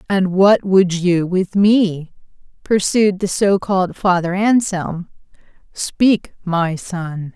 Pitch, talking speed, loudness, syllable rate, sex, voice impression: 185 Hz, 115 wpm, -16 LUFS, 3.2 syllables/s, female, very feminine, middle-aged, thin, slightly tensed, powerful, bright, soft, slightly muffled, fluent, slightly cute, cool, intellectual, refreshing, sincere, very calm, friendly, reassuring, very unique, elegant, wild, slightly sweet, lively, kind, slightly intense, slightly sharp